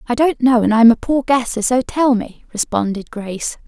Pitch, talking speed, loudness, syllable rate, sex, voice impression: 240 Hz, 210 wpm, -16 LUFS, 5.0 syllables/s, female, feminine, adult-like, tensed, powerful, fluent, raspy, intellectual, slightly friendly, lively, slightly sharp